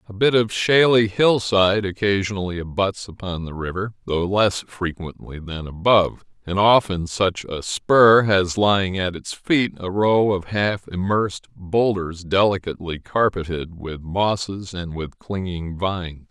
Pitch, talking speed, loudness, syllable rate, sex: 95 Hz, 145 wpm, -20 LUFS, 4.3 syllables/s, male